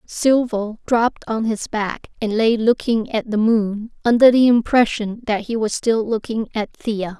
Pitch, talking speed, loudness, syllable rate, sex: 225 Hz, 175 wpm, -19 LUFS, 4.2 syllables/s, female